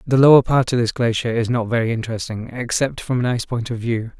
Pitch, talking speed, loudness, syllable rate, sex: 120 Hz, 245 wpm, -19 LUFS, 6.3 syllables/s, male